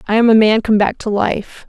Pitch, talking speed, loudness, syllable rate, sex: 215 Hz, 285 wpm, -14 LUFS, 5.3 syllables/s, female